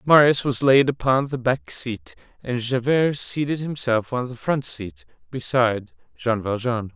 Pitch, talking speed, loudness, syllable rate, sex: 125 Hz, 155 wpm, -22 LUFS, 4.2 syllables/s, male